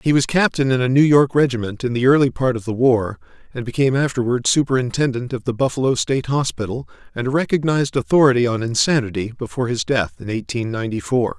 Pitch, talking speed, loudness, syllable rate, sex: 125 Hz, 195 wpm, -19 LUFS, 6.4 syllables/s, male